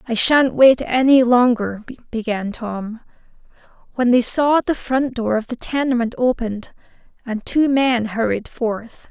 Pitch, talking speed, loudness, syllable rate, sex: 240 Hz, 145 wpm, -18 LUFS, 4.1 syllables/s, female